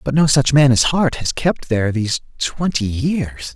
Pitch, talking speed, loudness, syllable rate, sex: 135 Hz, 205 wpm, -17 LUFS, 4.6 syllables/s, male